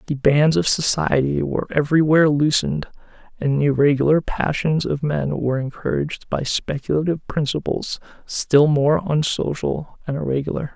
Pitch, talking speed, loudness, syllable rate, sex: 145 Hz, 135 wpm, -20 LUFS, 5.3 syllables/s, male